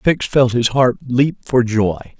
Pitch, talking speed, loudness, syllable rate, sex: 125 Hz, 190 wpm, -16 LUFS, 3.4 syllables/s, male